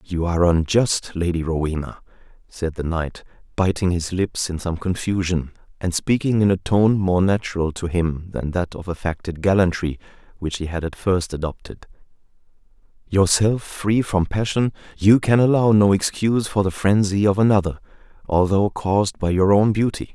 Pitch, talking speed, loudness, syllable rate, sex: 95 Hz, 160 wpm, -20 LUFS, 4.9 syllables/s, male